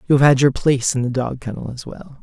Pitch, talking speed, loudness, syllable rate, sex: 135 Hz, 295 wpm, -18 LUFS, 6.5 syllables/s, male